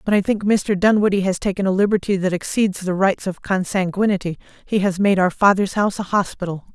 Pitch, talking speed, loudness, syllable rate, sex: 195 Hz, 205 wpm, -19 LUFS, 5.9 syllables/s, female